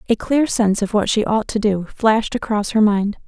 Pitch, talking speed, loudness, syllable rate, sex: 215 Hz, 240 wpm, -18 LUFS, 5.4 syllables/s, female